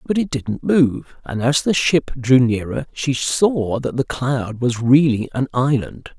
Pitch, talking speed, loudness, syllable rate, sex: 130 Hz, 185 wpm, -18 LUFS, 3.8 syllables/s, male